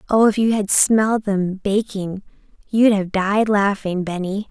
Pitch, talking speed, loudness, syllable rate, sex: 205 Hz, 160 wpm, -18 LUFS, 4.1 syllables/s, female